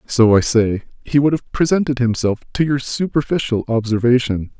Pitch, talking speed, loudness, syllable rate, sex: 125 Hz, 155 wpm, -17 LUFS, 5.1 syllables/s, male